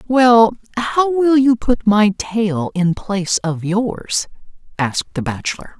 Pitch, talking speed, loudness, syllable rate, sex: 215 Hz, 145 wpm, -17 LUFS, 3.8 syllables/s, female